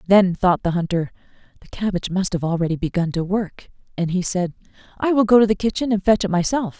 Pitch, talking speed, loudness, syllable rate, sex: 190 Hz, 220 wpm, -20 LUFS, 6.1 syllables/s, female